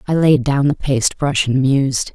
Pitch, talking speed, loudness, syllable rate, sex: 140 Hz, 225 wpm, -16 LUFS, 5.0 syllables/s, female